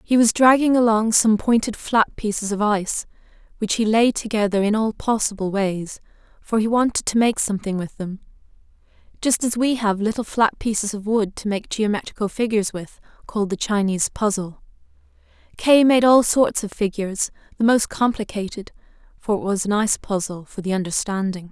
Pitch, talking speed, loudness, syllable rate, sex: 210 Hz, 175 wpm, -20 LUFS, 5.4 syllables/s, female